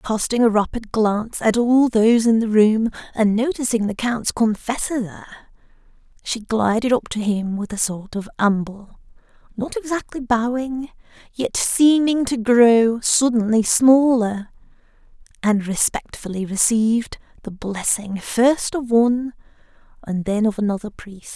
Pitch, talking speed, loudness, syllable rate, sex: 230 Hz, 135 wpm, -19 LUFS, 4.4 syllables/s, female